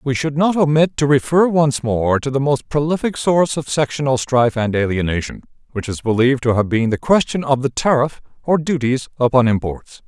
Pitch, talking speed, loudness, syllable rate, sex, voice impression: 135 Hz, 195 wpm, -17 LUFS, 5.6 syllables/s, male, very masculine, slightly old, very thick, very tensed, very powerful, bright, very soft, clear, fluent, cool, very intellectual, refreshing, sincere, calm, very friendly, very reassuring, unique, elegant, wild, sweet, very lively, very kind, slightly intense